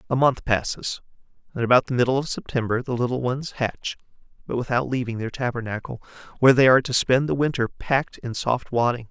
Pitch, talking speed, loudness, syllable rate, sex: 125 Hz, 190 wpm, -23 LUFS, 6.0 syllables/s, male